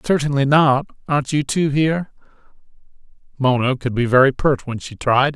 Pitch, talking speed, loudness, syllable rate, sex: 140 Hz, 155 wpm, -18 LUFS, 5.2 syllables/s, male